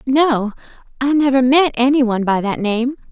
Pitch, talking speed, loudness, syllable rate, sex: 255 Hz, 175 wpm, -16 LUFS, 5.1 syllables/s, female